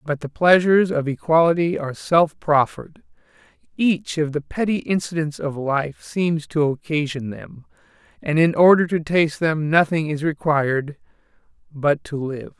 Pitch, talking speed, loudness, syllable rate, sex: 155 Hz, 150 wpm, -20 LUFS, 4.7 syllables/s, male